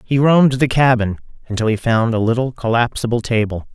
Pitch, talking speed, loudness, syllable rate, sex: 120 Hz, 175 wpm, -16 LUFS, 5.7 syllables/s, male